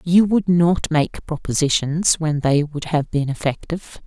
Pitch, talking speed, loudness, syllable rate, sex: 160 Hz, 160 wpm, -19 LUFS, 4.3 syllables/s, female